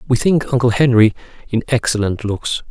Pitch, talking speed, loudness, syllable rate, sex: 120 Hz, 155 wpm, -16 LUFS, 5.2 syllables/s, male